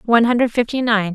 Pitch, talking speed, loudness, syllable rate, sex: 230 Hz, 210 wpm, -17 LUFS, 6.3 syllables/s, female